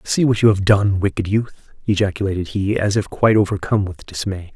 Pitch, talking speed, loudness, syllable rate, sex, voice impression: 100 Hz, 200 wpm, -18 LUFS, 5.8 syllables/s, male, very masculine, adult-like, slightly dark, cool, intellectual, calm